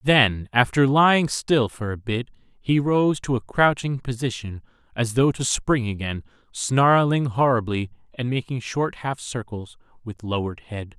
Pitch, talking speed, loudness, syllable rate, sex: 125 Hz, 155 wpm, -22 LUFS, 4.3 syllables/s, male